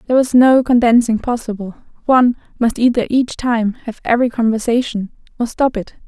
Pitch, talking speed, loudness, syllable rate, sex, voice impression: 235 Hz, 160 wpm, -15 LUFS, 5.6 syllables/s, female, very feminine, young, slightly adult-like, very thin, very tensed, slightly powerful, very bright, hard, very clear, very fluent, slightly raspy, very cute, intellectual, very refreshing, sincere, calm, friendly, reassuring, very unique, very elegant, sweet, lively, kind, sharp, slightly modest, very light